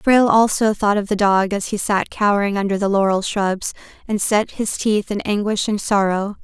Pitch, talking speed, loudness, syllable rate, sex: 205 Hz, 205 wpm, -18 LUFS, 5.0 syllables/s, female